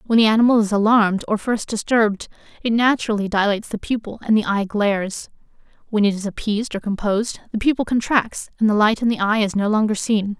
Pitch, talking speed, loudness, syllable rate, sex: 215 Hz, 210 wpm, -19 LUFS, 6.2 syllables/s, female